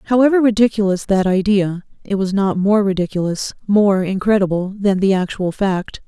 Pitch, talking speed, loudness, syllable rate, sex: 195 Hz, 150 wpm, -17 LUFS, 5.1 syllables/s, female